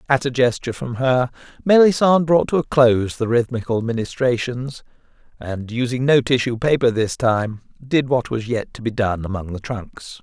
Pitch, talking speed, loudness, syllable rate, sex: 125 Hz, 165 wpm, -19 LUFS, 5.0 syllables/s, male